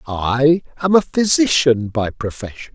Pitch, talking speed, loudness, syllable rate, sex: 140 Hz, 130 wpm, -16 LUFS, 4.2 syllables/s, male